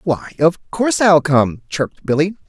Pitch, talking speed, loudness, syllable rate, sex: 165 Hz, 170 wpm, -16 LUFS, 4.6 syllables/s, male